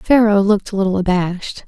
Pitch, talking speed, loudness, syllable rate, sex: 200 Hz, 180 wpm, -16 LUFS, 6.2 syllables/s, female